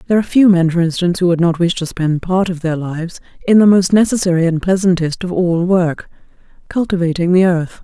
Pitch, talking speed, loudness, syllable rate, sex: 175 Hz, 205 wpm, -14 LUFS, 6.0 syllables/s, female